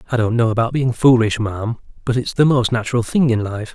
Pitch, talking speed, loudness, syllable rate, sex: 120 Hz, 240 wpm, -17 LUFS, 6.1 syllables/s, male